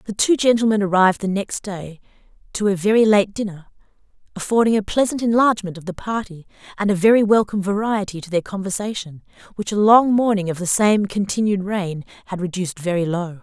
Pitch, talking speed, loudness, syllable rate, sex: 200 Hz, 180 wpm, -19 LUFS, 6.0 syllables/s, female